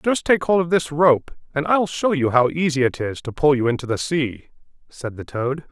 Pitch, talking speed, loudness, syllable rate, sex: 145 Hz, 240 wpm, -20 LUFS, 5.0 syllables/s, male